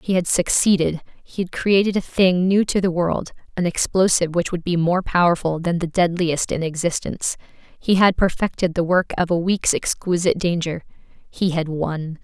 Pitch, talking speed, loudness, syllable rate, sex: 175 Hz, 180 wpm, -20 LUFS, 5.0 syllables/s, female